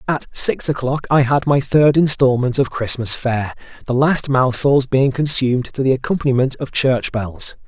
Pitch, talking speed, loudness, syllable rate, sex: 130 Hz, 170 wpm, -16 LUFS, 4.7 syllables/s, male